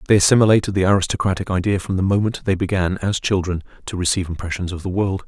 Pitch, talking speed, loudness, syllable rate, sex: 95 Hz, 205 wpm, -19 LUFS, 7.0 syllables/s, male